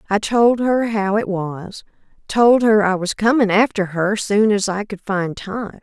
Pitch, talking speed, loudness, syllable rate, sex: 205 Hz, 195 wpm, -17 LUFS, 4.1 syllables/s, female